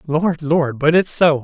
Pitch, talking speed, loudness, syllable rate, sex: 155 Hz, 210 wpm, -16 LUFS, 3.9 syllables/s, male